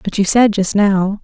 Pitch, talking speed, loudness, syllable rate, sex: 200 Hz, 245 wpm, -14 LUFS, 4.4 syllables/s, female